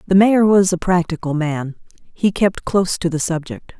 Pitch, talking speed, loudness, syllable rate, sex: 180 Hz, 190 wpm, -17 LUFS, 4.8 syllables/s, female